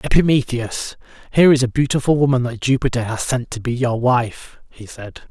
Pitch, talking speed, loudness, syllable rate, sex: 125 Hz, 180 wpm, -18 LUFS, 5.3 syllables/s, male